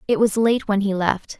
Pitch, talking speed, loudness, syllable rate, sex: 205 Hz, 260 wpm, -20 LUFS, 4.9 syllables/s, female